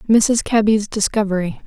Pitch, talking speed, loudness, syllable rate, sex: 210 Hz, 110 wpm, -17 LUFS, 4.9 syllables/s, female